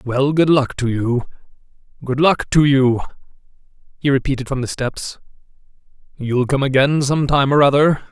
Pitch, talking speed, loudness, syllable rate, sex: 135 Hz, 155 wpm, -17 LUFS, 4.8 syllables/s, male